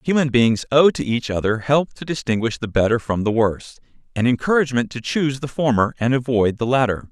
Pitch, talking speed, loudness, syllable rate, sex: 125 Hz, 205 wpm, -19 LUFS, 5.8 syllables/s, male